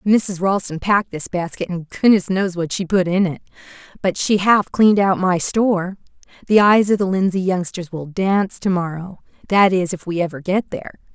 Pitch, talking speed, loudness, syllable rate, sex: 185 Hz, 190 wpm, -18 LUFS, 5.2 syllables/s, female